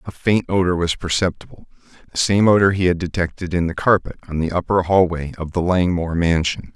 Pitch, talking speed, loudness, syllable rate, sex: 90 Hz, 195 wpm, -19 LUFS, 5.8 syllables/s, male